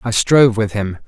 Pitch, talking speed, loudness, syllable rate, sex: 110 Hz, 225 wpm, -15 LUFS, 5.4 syllables/s, male